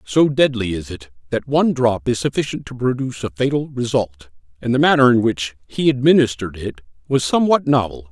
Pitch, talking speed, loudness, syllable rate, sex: 125 Hz, 185 wpm, -18 LUFS, 5.7 syllables/s, male